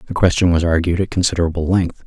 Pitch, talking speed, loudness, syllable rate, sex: 90 Hz, 205 wpm, -17 LUFS, 6.9 syllables/s, male